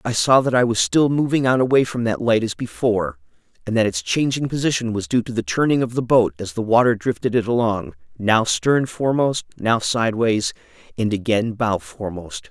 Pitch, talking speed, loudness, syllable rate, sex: 115 Hz, 200 wpm, -20 LUFS, 5.5 syllables/s, male